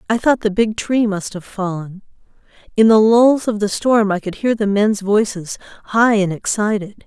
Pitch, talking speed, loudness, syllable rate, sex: 210 Hz, 195 wpm, -16 LUFS, 4.7 syllables/s, female